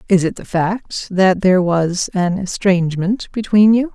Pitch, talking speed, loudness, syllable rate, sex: 190 Hz, 165 wpm, -16 LUFS, 4.4 syllables/s, female